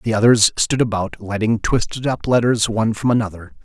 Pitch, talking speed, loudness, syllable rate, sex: 110 Hz, 180 wpm, -18 LUFS, 5.4 syllables/s, male